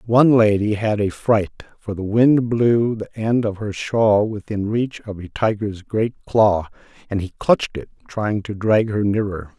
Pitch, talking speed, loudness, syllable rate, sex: 105 Hz, 190 wpm, -19 LUFS, 4.2 syllables/s, male